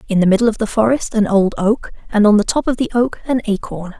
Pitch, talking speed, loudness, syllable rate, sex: 220 Hz, 270 wpm, -16 LUFS, 6.1 syllables/s, female